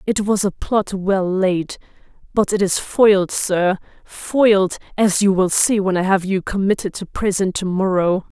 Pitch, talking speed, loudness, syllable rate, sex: 195 Hz, 180 wpm, -18 LUFS, 4.3 syllables/s, female